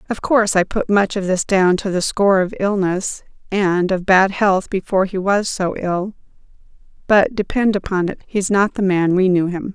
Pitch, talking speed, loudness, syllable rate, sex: 190 Hz, 205 wpm, -17 LUFS, 4.8 syllables/s, female